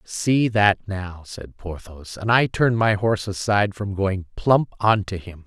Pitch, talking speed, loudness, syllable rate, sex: 100 Hz, 185 wpm, -21 LUFS, 4.3 syllables/s, male